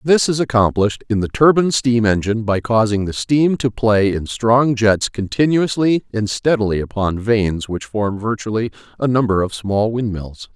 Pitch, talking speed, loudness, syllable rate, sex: 115 Hz, 170 wpm, -17 LUFS, 4.9 syllables/s, male